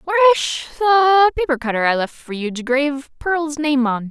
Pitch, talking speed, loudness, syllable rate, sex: 295 Hz, 190 wpm, -18 LUFS, 6.2 syllables/s, female